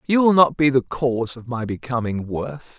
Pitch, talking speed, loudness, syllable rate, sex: 130 Hz, 215 wpm, -20 LUFS, 5.6 syllables/s, male